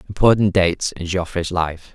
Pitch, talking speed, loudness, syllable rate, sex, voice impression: 90 Hz, 155 wpm, -19 LUFS, 5.2 syllables/s, male, masculine, adult-like, tensed, slightly powerful, slightly bright, cool, calm, friendly, reassuring, wild, slightly lively, slightly modest